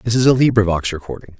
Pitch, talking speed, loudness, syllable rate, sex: 100 Hz, 215 wpm, -16 LUFS, 6.7 syllables/s, male